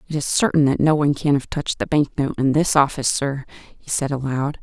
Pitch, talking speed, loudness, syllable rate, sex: 140 Hz, 245 wpm, -20 LUFS, 5.9 syllables/s, female